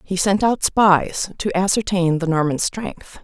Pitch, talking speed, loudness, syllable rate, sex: 185 Hz, 165 wpm, -19 LUFS, 3.9 syllables/s, female